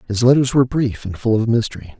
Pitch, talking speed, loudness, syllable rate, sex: 115 Hz, 240 wpm, -17 LUFS, 6.7 syllables/s, male